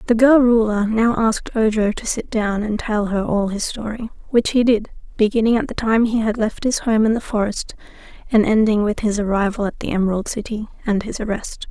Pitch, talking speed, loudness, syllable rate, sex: 215 Hz, 215 wpm, -19 LUFS, 5.4 syllables/s, female